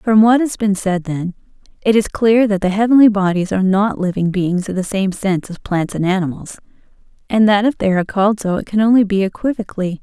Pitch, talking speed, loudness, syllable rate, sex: 200 Hz, 220 wpm, -16 LUFS, 5.9 syllables/s, female